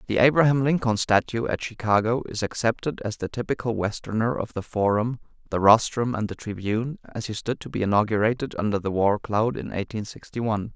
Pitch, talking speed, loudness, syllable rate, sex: 110 Hz, 190 wpm, -24 LUFS, 5.7 syllables/s, male